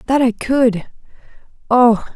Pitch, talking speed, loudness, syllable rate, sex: 235 Hz, 85 wpm, -15 LUFS, 3.4 syllables/s, female